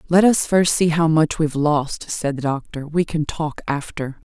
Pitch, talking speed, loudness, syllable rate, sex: 155 Hz, 210 wpm, -20 LUFS, 4.5 syllables/s, female